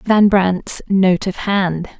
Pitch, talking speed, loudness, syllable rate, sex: 190 Hz, 150 wpm, -16 LUFS, 2.9 syllables/s, female